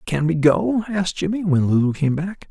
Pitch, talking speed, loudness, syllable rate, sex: 170 Hz, 215 wpm, -20 LUFS, 5.1 syllables/s, male